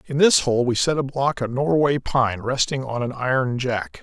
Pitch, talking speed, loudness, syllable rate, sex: 130 Hz, 225 wpm, -21 LUFS, 4.7 syllables/s, male